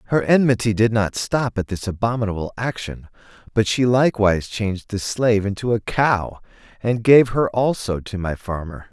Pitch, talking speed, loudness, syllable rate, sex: 110 Hz, 170 wpm, -20 LUFS, 5.1 syllables/s, male